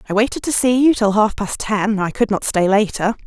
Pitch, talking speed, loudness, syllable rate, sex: 215 Hz, 260 wpm, -17 LUFS, 5.3 syllables/s, female